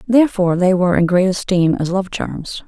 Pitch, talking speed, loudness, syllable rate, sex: 185 Hz, 200 wpm, -16 LUFS, 5.6 syllables/s, female